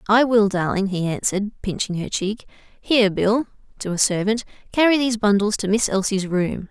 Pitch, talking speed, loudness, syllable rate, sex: 210 Hz, 160 wpm, -20 LUFS, 5.4 syllables/s, female